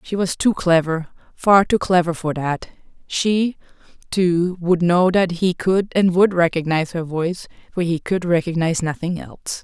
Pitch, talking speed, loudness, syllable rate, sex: 175 Hz, 160 wpm, -19 LUFS, 4.8 syllables/s, female